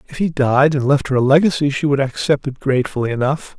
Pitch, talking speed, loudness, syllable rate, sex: 140 Hz, 235 wpm, -17 LUFS, 6.2 syllables/s, male